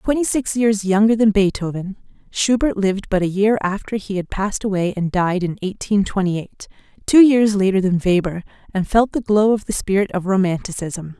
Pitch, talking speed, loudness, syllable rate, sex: 200 Hz, 195 wpm, -18 LUFS, 5.3 syllables/s, female